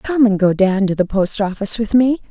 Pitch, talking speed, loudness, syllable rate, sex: 210 Hz, 260 wpm, -16 LUFS, 5.5 syllables/s, female